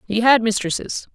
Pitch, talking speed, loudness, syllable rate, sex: 225 Hz, 155 wpm, -18 LUFS, 5.3 syllables/s, female